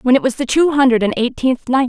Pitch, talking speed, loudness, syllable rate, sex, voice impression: 255 Hz, 285 wpm, -15 LUFS, 6.2 syllables/s, female, feminine, adult-like, clear, slightly cute, slightly sincere, slightly lively